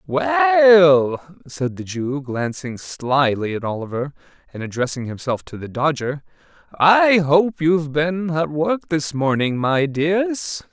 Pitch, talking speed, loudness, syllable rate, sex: 155 Hz, 135 wpm, -19 LUFS, 3.6 syllables/s, male